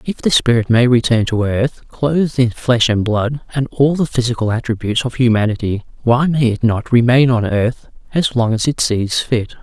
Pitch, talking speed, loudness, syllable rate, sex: 120 Hz, 200 wpm, -16 LUFS, 4.9 syllables/s, male